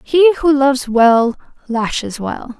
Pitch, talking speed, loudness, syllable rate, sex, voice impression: 265 Hz, 140 wpm, -15 LUFS, 4.2 syllables/s, female, very feminine, young, very thin, tensed, weak, slightly dark, hard, very clear, fluent, very cute, intellectual, very refreshing, sincere, calm, very friendly, very reassuring, very unique, elegant, slightly wild, sweet, lively, kind, slightly intense, slightly sharp